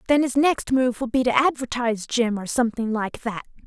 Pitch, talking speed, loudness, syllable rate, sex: 240 Hz, 215 wpm, -22 LUFS, 5.6 syllables/s, female